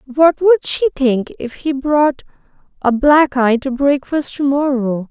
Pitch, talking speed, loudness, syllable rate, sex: 275 Hz, 165 wpm, -15 LUFS, 3.8 syllables/s, female